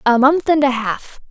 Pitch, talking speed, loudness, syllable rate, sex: 270 Hz, 230 wpm, -16 LUFS, 4.6 syllables/s, female